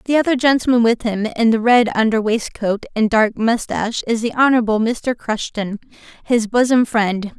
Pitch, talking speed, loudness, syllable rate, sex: 230 Hz, 170 wpm, -17 LUFS, 5.0 syllables/s, female